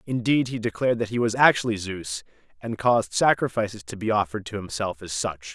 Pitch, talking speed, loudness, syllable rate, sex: 105 Hz, 195 wpm, -24 LUFS, 5.9 syllables/s, male